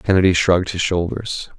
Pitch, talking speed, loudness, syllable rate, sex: 90 Hz, 150 wpm, -18 LUFS, 5.4 syllables/s, male